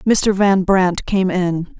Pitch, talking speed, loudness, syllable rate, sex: 190 Hz, 165 wpm, -16 LUFS, 2.9 syllables/s, female